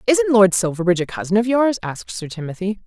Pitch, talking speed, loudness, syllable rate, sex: 205 Hz, 210 wpm, -19 LUFS, 6.4 syllables/s, female